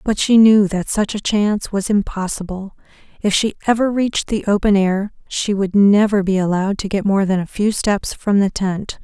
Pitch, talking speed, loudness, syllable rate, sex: 200 Hz, 205 wpm, -17 LUFS, 5.0 syllables/s, female